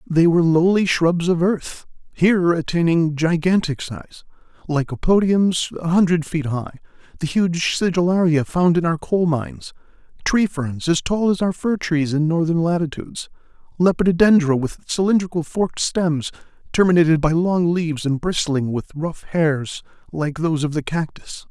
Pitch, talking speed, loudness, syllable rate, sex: 165 Hz, 150 wpm, -19 LUFS, 4.8 syllables/s, male